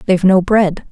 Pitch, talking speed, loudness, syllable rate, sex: 190 Hz, 195 wpm, -13 LUFS, 5.5 syllables/s, female